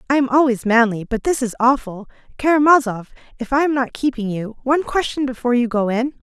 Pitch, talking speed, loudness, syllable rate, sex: 250 Hz, 200 wpm, -18 LUFS, 6.1 syllables/s, female